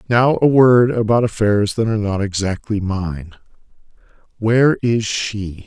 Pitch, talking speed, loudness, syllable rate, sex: 110 Hz, 140 wpm, -17 LUFS, 4.4 syllables/s, male